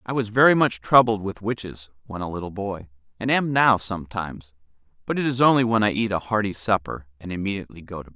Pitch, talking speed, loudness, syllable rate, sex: 105 Hz, 220 wpm, -22 LUFS, 6.3 syllables/s, male